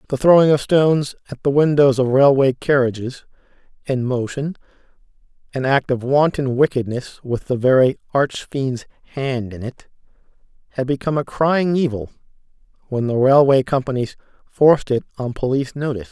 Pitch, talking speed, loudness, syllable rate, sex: 135 Hz, 140 wpm, -18 LUFS, 5.3 syllables/s, male